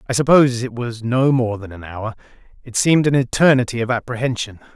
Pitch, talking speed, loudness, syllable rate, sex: 120 Hz, 190 wpm, -18 LUFS, 6.1 syllables/s, male